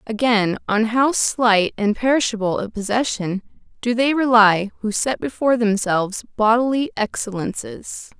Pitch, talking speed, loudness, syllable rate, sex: 225 Hz, 125 wpm, -19 LUFS, 4.4 syllables/s, female